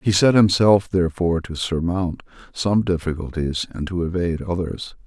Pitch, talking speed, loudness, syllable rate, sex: 90 Hz, 140 wpm, -21 LUFS, 5.0 syllables/s, male